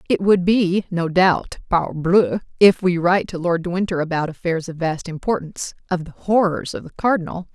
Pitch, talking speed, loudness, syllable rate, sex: 175 Hz, 190 wpm, -20 LUFS, 5.2 syllables/s, female